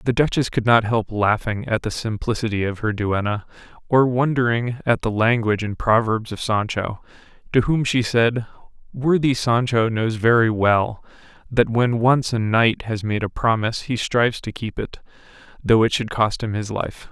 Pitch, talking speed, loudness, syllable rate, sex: 115 Hz, 180 wpm, -20 LUFS, 4.7 syllables/s, male